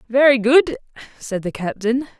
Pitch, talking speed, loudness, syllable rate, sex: 235 Hz, 135 wpm, -18 LUFS, 4.6 syllables/s, female